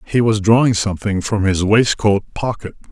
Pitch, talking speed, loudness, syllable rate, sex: 105 Hz, 165 wpm, -16 LUFS, 5.2 syllables/s, male